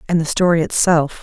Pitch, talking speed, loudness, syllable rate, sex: 165 Hz, 195 wpm, -16 LUFS, 5.7 syllables/s, female